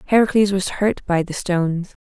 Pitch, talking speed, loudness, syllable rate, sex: 190 Hz, 175 wpm, -19 LUFS, 5.3 syllables/s, female